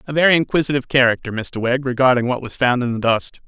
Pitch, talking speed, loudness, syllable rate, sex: 125 Hz, 225 wpm, -18 LUFS, 6.7 syllables/s, male